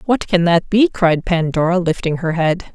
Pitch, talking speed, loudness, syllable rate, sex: 175 Hz, 195 wpm, -16 LUFS, 4.8 syllables/s, female